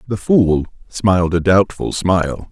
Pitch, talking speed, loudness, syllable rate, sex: 95 Hz, 145 wpm, -16 LUFS, 4.0 syllables/s, male